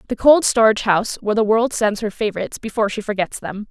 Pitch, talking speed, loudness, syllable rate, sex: 215 Hz, 225 wpm, -18 LUFS, 6.9 syllables/s, female